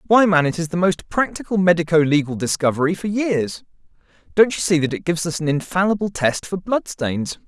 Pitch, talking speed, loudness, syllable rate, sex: 175 Hz, 200 wpm, -19 LUFS, 5.7 syllables/s, male